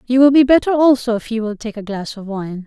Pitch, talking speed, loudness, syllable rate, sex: 235 Hz, 290 wpm, -16 LUFS, 6.0 syllables/s, female